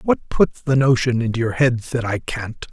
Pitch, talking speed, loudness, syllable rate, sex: 120 Hz, 220 wpm, -19 LUFS, 4.8 syllables/s, male